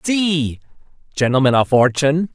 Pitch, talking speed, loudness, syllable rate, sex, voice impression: 145 Hz, 100 wpm, -16 LUFS, 4.8 syllables/s, male, masculine, middle-aged, slightly thick, sincere, slightly wild